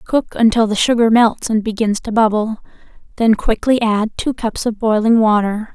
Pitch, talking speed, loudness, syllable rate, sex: 220 Hz, 180 wpm, -15 LUFS, 4.8 syllables/s, female